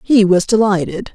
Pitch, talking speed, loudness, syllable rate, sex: 200 Hz, 155 wpm, -14 LUFS, 4.8 syllables/s, female